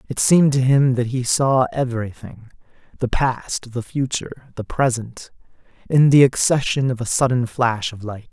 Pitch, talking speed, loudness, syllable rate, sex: 125 Hz, 150 wpm, -19 LUFS, 4.8 syllables/s, male